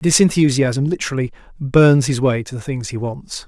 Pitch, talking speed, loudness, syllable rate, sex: 135 Hz, 190 wpm, -17 LUFS, 5.1 syllables/s, male